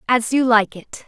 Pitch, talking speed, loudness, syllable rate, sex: 230 Hz, 225 wpm, -17 LUFS, 4.4 syllables/s, female